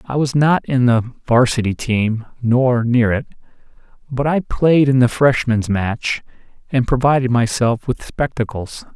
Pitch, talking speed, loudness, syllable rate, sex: 125 Hz, 145 wpm, -17 LUFS, 4.1 syllables/s, male